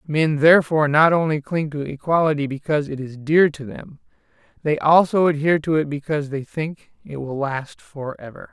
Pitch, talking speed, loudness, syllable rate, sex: 150 Hz, 175 wpm, -20 LUFS, 5.4 syllables/s, male